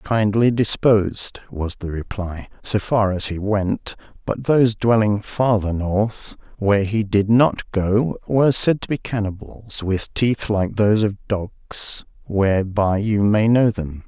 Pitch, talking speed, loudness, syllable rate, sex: 105 Hz, 155 wpm, -20 LUFS, 4.0 syllables/s, male